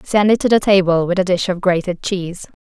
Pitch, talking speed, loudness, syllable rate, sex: 185 Hz, 250 wpm, -16 LUFS, 5.8 syllables/s, female